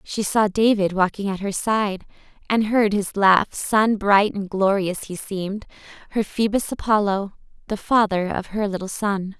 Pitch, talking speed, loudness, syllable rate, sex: 200 Hz, 160 wpm, -21 LUFS, 4.4 syllables/s, female